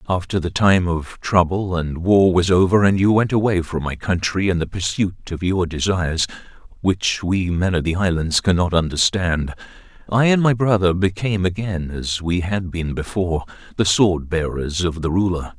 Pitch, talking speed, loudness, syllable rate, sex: 90 Hz, 180 wpm, -19 LUFS, 4.8 syllables/s, male